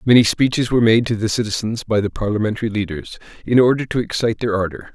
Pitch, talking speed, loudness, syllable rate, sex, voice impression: 110 Hz, 205 wpm, -18 LUFS, 6.8 syllables/s, male, masculine, middle-aged, thick, tensed, powerful, hard, slightly muffled, intellectual, calm, slightly mature, slightly reassuring, wild, lively, slightly strict